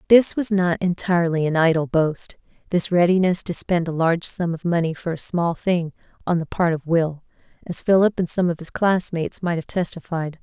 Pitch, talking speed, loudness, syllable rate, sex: 170 Hz, 195 wpm, -21 LUFS, 5.3 syllables/s, female